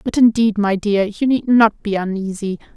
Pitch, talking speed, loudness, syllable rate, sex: 210 Hz, 195 wpm, -17 LUFS, 4.8 syllables/s, female